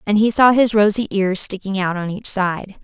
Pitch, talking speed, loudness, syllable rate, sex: 200 Hz, 235 wpm, -17 LUFS, 4.9 syllables/s, female